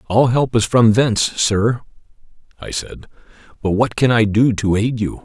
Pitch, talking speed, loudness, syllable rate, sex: 110 Hz, 185 wpm, -17 LUFS, 4.6 syllables/s, male